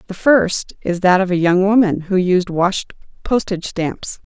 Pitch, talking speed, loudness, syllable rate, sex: 190 Hz, 180 wpm, -16 LUFS, 4.3 syllables/s, female